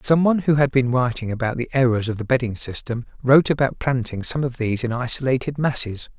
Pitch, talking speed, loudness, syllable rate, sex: 125 Hz, 215 wpm, -21 LUFS, 6.2 syllables/s, male